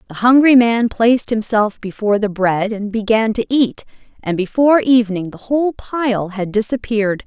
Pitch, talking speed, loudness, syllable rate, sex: 225 Hz, 165 wpm, -16 LUFS, 5.1 syllables/s, female